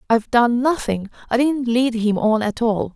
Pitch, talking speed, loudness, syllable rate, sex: 235 Hz, 225 wpm, -19 LUFS, 4.7 syllables/s, female